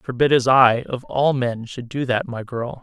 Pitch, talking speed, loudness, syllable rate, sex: 125 Hz, 235 wpm, -19 LUFS, 4.3 syllables/s, male